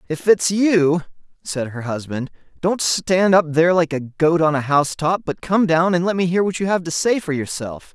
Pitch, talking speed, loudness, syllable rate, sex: 165 Hz, 235 wpm, -19 LUFS, 4.7 syllables/s, male